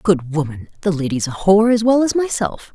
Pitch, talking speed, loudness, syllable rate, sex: 185 Hz, 195 wpm, -17 LUFS, 5.5 syllables/s, female